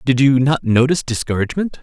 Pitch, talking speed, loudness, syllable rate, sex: 135 Hz, 165 wpm, -16 LUFS, 6.4 syllables/s, male